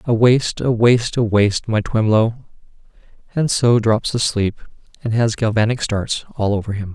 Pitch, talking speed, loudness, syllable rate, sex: 110 Hz, 165 wpm, -18 LUFS, 4.9 syllables/s, male